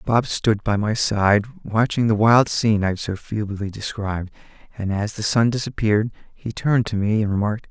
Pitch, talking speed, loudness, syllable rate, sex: 105 Hz, 195 wpm, -21 LUFS, 5.2 syllables/s, male